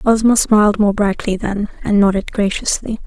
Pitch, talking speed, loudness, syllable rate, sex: 205 Hz, 155 wpm, -16 LUFS, 5.1 syllables/s, female